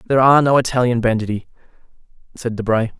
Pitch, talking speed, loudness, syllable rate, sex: 120 Hz, 140 wpm, -17 LUFS, 7.5 syllables/s, male